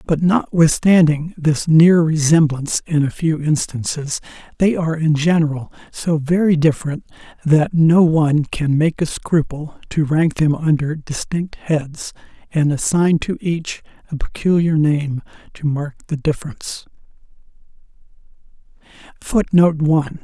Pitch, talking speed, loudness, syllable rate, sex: 155 Hz, 125 wpm, -17 LUFS, 4.3 syllables/s, male